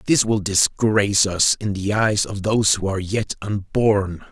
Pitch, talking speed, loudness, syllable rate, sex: 100 Hz, 180 wpm, -19 LUFS, 4.5 syllables/s, male